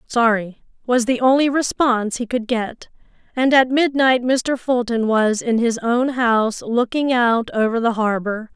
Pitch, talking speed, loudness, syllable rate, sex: 240 Hz, 160 wpm, -18 LUFS, 4.3 syllables/s, female